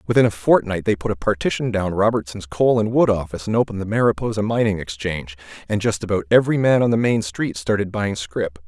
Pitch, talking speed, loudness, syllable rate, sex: 100 Hz, 215 wpm, -20 LUFS, 6.3 syllables/s, male